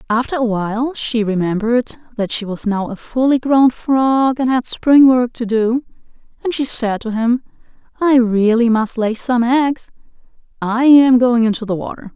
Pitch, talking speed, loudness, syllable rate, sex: 240 Hz, 180 wpm, -15 LUFS, 4.5 syllables/s, female